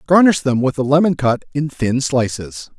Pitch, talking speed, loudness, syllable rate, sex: 140 Hz, 195 wpm, -17 LUFS, 4.8 syllables/s, male